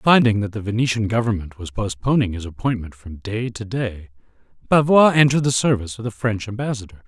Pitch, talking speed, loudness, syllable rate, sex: 110 Hz, 180 wpm, -20 LUFS, 6.1 syllables/s, male